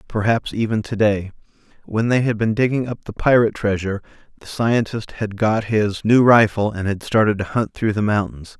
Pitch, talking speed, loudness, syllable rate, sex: 110 Hz, 190 wpm, -19 LUFS, 5.2 syllables/s, male